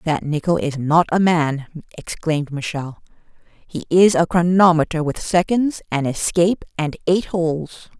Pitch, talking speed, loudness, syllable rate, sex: 165 Hz, 145 wpm, -18 LUFS, 4.6 syllables/s, female